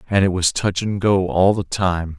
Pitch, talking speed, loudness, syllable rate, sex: 95 Hz, 245 wpm, -19 LUFS, 4.5 syllables/s, male